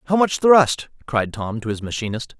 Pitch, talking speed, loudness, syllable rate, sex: 130 Hz, 200 wpm, -20 LUFS, 4.9 syllables/s, male